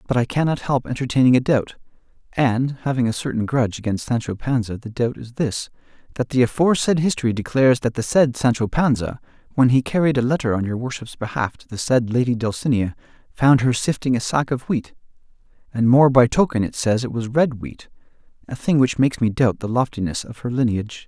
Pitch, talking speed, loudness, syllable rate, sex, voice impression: 125 Hz, 200 wpm, -20 LUFS, 5.8 syllables/s, male, masculine, adult-like, tensed, very clear, refreshing, friendly, lively